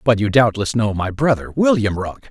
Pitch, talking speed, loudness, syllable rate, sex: 115 Hz, 210 wpm, -18 LUFS, 5.1 syllables/s, male